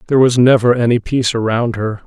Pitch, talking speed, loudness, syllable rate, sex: 120 Hz, 205 wpm, -14 LUFS, 6.5 syllables/s, male